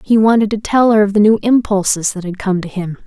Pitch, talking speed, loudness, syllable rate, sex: 205 Hz, 275 wpm, -14 LUFS, 5.9 syllables/s, female